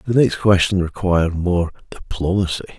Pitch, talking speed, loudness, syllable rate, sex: 90 Hz, 130 wpm, -18 LUFS, 5.1 syllables/s, male